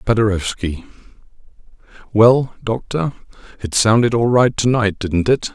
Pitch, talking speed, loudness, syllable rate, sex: 110 Hz, 120 wpm, -17 LUFS, 4.5 syllables/s, male